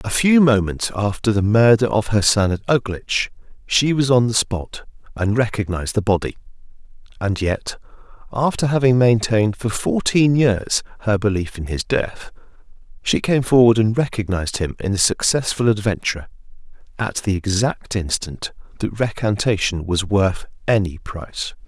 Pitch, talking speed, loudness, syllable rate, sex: 110 Hz, 145 wpm, -19 LUFS, 4.8 syllables/s, male